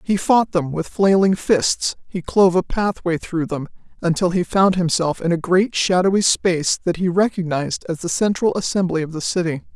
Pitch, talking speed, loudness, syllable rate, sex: 180 Hz, 190 wpm, -19 LUFS, 5.1 syllables/s, female